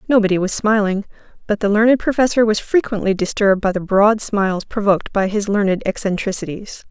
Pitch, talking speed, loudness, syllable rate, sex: 205 Hz, 165 wpm, -17 LUFS, 5.9 syllables/s, female